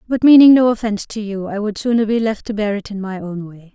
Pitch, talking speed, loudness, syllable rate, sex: 210 Hz, 290 wpm, -16 LUFS, 6.1 syllables/s, female